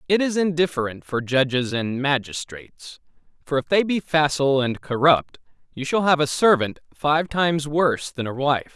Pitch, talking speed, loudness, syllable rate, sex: 145 Hz, 170 wpm, -21 LUFS, 5.0 syllables/s, male